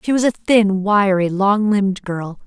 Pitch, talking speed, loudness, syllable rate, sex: 200 Hz, 195 wpm, -17 LUFS, 4.3 syllables/s, female